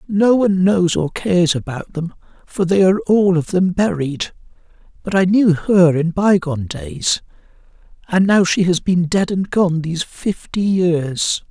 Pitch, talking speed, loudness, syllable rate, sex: 175 Hz, 170 wpm, -17 LUFS, 4.2 syllables/s, male